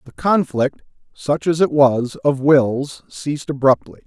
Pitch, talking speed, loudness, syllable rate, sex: 140 Hz, 145 wpm, -18 LUFS, 4.0 syllables/s, male